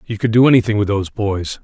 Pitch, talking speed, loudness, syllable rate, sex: 105 Hz, 255 wpm, -16 LUFS, 6.7 syllables/s, male